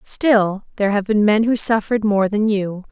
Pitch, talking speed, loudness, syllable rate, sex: 210 Hz, 205 wpm, -17 LUFS, 4.9 syllables/s, female